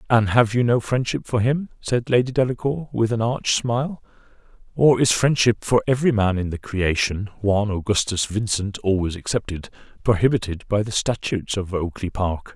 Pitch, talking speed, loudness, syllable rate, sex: 110 Hz, 165 wpm, -21 LUFS, 5.2 syllables/s, male